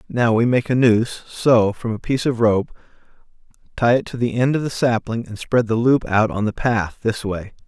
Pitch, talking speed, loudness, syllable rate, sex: 115 Hz, 205 wpm, -19 LUFS, 5.1 syllables/s, male